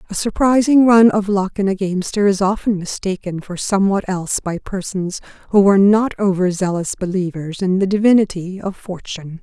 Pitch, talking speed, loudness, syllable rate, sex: 195 Hz, 170 wpm, -17 LUFS, 5.4 syllables/s, female